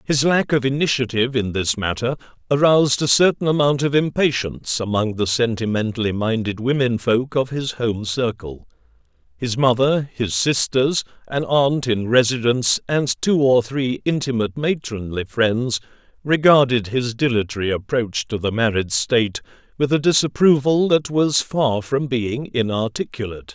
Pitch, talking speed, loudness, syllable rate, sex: 125 Hz, 140 wpm, -19 LUFS, 4.8 syllables/s, male